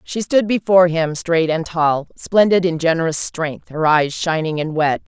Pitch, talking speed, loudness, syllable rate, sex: 165 Hz, 185 wpm, -17 LUFS, 4.5 syllables/s, female